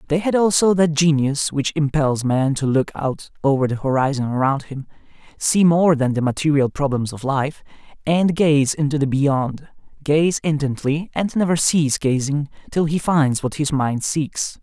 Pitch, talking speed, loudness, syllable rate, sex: 145 Hz, 170 wpm, -19 LUFS, 4.6 syllables/s, male